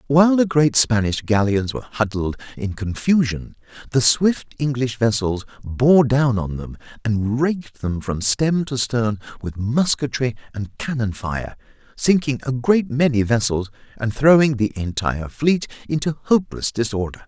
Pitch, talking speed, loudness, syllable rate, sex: 125 Hz, 145 wpm, -20 LUFS, 4.5 syllables/s, male